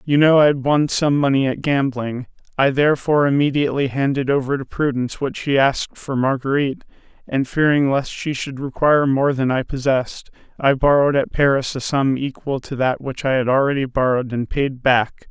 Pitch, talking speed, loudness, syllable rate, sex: 135 Hz, 190 wpm, -19 LUFS, 5.5 syllables/s, male